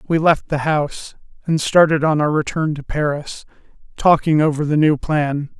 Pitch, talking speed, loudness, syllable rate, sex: 150 Hz, 170 wpm, -17 LUFS, 4.8 syllables/s, male